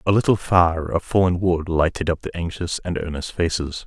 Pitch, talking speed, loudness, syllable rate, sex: 85 Hz, 200 wpm, -21 LUFS, 5.1 syllables/s, male